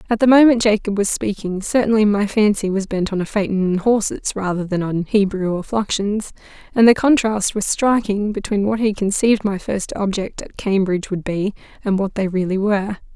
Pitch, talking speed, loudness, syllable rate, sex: 205 Hz, 195 wpm, -18 LUFS, 5.3 syllables/s, female